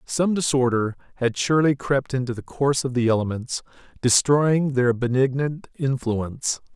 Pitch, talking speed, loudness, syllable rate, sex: 130 Hz, 135 wpm, -22 LUFS, 4.8 syllables/s, male